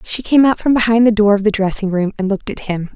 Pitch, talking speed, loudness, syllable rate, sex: 210 Hz, 305 wpm, -15 LUFS, 6.5 syllables/s, female